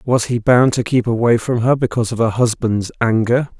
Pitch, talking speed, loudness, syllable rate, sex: 120 Hz, 215 wpm, -16 LUFS, 5.4 syllables/s, male